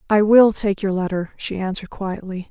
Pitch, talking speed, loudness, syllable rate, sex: 195 Hz, 190 wpm, -19 LUFS, 5.3 syllables/s, female